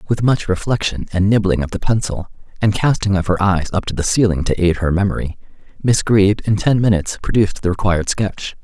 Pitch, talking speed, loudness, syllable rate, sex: 100 Hz, 210 wpm, -17 LUFS, 5.8 syllables/s, male